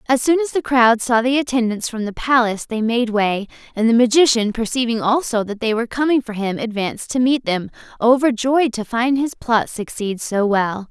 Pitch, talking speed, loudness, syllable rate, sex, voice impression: 235 Hz, 205 wpm, -18 LUFS, 5.2 syllables/s, female, very feminine, slightly young, slightly adult-like, thin, tensed, slightly powerful, bright, very hard, clear, fluent, cute, slightly cool, intellectual, refreshing, slightly sincere, calm, friendly, very reassuring, unique, slightly elegant, wild, sweet, very lively, strict, intense, slightly sharp